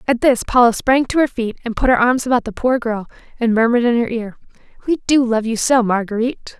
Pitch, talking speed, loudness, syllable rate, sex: 240 Hz, 235 wpm, -17 LUFS, 6.0 syllables/s, female